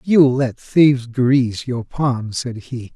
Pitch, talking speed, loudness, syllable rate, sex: 125 Hz, 160 wpm, -18 LUFS, 3.5 syllables/s, male